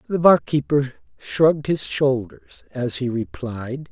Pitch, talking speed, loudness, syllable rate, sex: 135 Hz, 140 wpm, -21 LUFS, 3.9 syllables/s, male